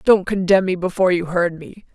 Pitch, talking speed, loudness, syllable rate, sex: 185 Hz, 215 wpm, -18 LUFS, 6.2 syllables/s, female